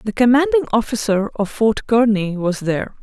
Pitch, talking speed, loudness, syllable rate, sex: 225 Hz, 160 wpm, -17 LUFS, 5.1 syllables/s, female